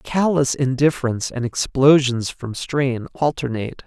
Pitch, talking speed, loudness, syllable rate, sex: 135 Hz, 110 wpm, -20 LUFS, 4.5 syllables/s, male